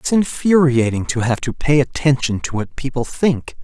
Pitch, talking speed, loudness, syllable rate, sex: 135 Hz, 180 wpm, -18 LUFS, 4.8 syllables/s, male